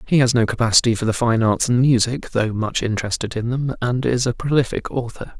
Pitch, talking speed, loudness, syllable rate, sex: 120 Hz, 220 wpm, -19 LUFS, 5.8 syllables/s, male